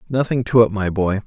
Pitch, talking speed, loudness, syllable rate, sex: 110 Hz, 235 wpm, -18 LUFS, 5.7 syllables/s, male